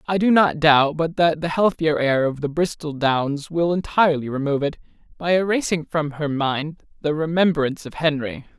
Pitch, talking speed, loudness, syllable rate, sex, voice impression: 155 Hz, 180 wpm, -21 LUFS, 5.0 syllables/s, male, very masculine, very adult-like, tensed, powerful, slightly bright, slightly hard, clear, slightly halting, slightly cool, intellectual, refreshing, sincere, slightly calm, slightly friendly, slightly reassuring, slightly unique, slightly elegant, slightly wild, slightly sweet, lively, slightly strict, slightly intense